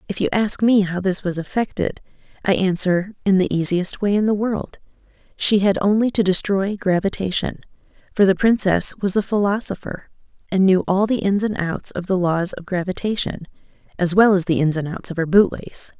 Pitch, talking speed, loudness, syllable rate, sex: 190 Hz, 195 wpm, -19 LUFS, 5.1 syllables/s, female